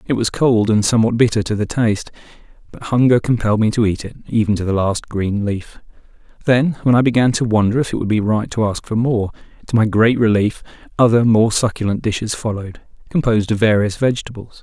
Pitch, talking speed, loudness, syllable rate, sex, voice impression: 110 Hz, 205 wpm, -17 LUFS, 6.0 syllables/s, male, masculine, adult-like, relaxed, soft, muffled, slightly raspy, cool, intellectual, sincere, friendly, lively, kind, slightly modest